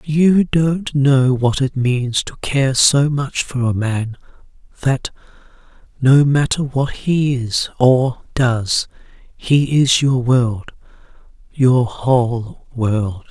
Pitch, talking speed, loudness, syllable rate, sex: 130 Hz, 125 wpm, -16 LUFS, 2.9 syllables/s, male